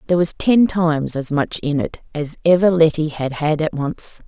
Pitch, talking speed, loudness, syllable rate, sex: 160 Hz, 210 wpm, -18 LUFS, 4.9 syllables/s, female